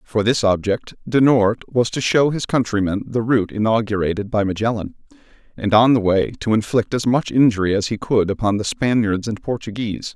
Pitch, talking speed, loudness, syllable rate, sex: 110 Hz, 190 wpm, -19 LUFS, 5.4 syllables/s, male